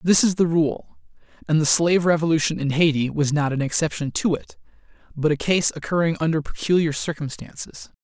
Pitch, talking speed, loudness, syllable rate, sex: 160 Hz, 170 wpm, -21 LUFS, 5.7 syllables/s, male